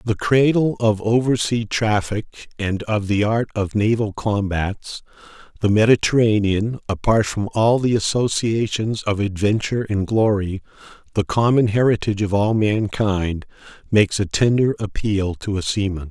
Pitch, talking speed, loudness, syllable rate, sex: 105 Hz, 135 wpm, -19 LUFS, 4.6 syllables/s, male